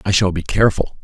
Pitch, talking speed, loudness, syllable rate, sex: 95 Hz, 230 wpm, -17 LUFS, 6.6 syllables/s, male